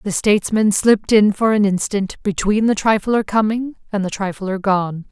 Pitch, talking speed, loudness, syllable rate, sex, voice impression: 205 Hz, 175 wpm, -17 LUFS, 4.8 syllables/s, female, feminine, adult-like, tensed, powerful, bright, halting, friendly, elegant, lively, kind, intense